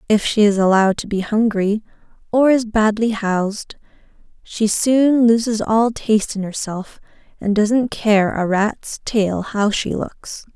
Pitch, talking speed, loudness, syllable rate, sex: 215 Hz, 155 wpm, -18 LUFS, 4.0 syllables/s, female